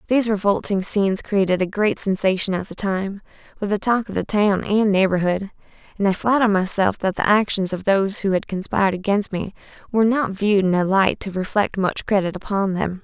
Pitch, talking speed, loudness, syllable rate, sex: 200 Hz, 200 wpm, -20 LUFS, 5.7 syllables/s, female